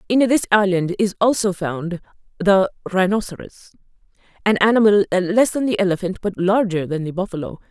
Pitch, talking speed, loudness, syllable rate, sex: 195 Hz, 150 wpm, -19 LUFS, 5.3 syllables/s, female